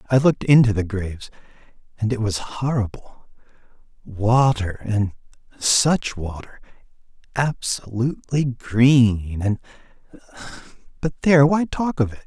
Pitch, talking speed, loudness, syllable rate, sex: 120 Hz, 105 wpm, -20 LUFS, 4.2 syllables/s, male